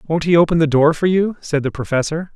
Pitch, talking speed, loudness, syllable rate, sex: 160 Hz, 255 wpm, -17 LUFS, 5.7 syllables/s, male